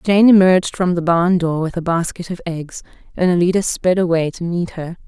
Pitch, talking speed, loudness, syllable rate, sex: 175 Hz, 215 wpm, -17 LUFS, 5.3 syllables/s, female